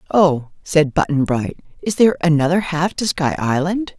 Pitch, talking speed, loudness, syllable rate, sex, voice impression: 165 Hz, 165 wpm, -18 LUFS, 4.8 syllables/s, female, feminine, middle-aged, slightly thick, tensed, powerful, clear, intellectual, calm, reassuring, elegant, slightly lively, slightly strict